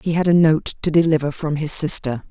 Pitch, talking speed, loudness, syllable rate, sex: 155 Hz, 235 wpm, -17 LUFS, 5.5 syllables/s, female